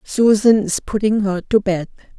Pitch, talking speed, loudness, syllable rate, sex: 205 Hz, 165 wpm, -17 LUFS, 4.4 syllables/s, female